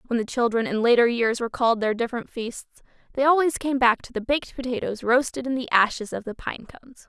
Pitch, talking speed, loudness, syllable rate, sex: 240 Hz, 220 wpm, -23 LUFS, 6.5 syllables/s, female